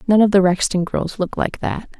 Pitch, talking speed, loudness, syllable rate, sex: 190 Hz, 240 wpm, -18 LUFS, 5.6 syllables/s, female